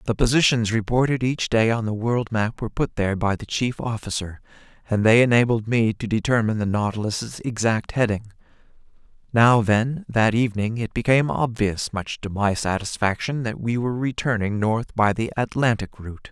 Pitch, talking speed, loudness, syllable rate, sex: 115 Hz, 170 wpm, -22 LUFS, 5.3 syllables/s, male